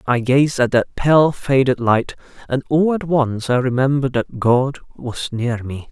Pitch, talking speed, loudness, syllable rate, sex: 130 Hz, 185 wpm, -18 LUFS, 4.2 syllables/s, male